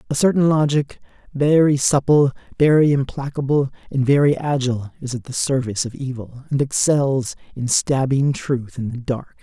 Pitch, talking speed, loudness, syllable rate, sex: 135 Hz, 155 wpm, -19 LUFS, 5.0 syllables/s, male